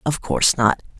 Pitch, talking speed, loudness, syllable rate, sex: 125 Hz, 180 wpm, -18 LUFS, 5.3 syllables/s, female